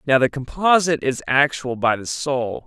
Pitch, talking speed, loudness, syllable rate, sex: 135 Hz, 180 wpm, -20 LUFS, 4.7 syllables/s, male